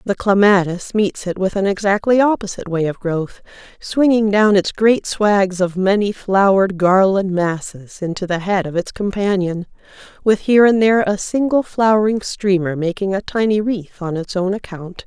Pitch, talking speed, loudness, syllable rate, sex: 195 Hz, 170 wpm, -17 LUFS, 4.9 syllables/s, female